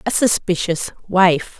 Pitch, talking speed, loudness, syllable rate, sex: 180 Hz, 115 wpm, -17 LUFS, 3.8 syllables/s, female